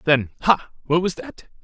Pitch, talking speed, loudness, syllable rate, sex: 155 Hz, 145 wpm, -21 LUFS, 4.6 syllables/s, male